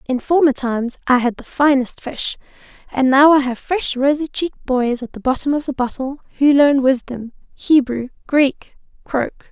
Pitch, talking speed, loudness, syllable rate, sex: 270 Hz, 170 wpm, -17 LUFS, 4.8 syllables/s, female